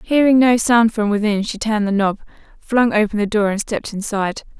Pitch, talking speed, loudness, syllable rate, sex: 215 Hz, 210 wpm, -17 LUFS, 5.8 syllables/s, female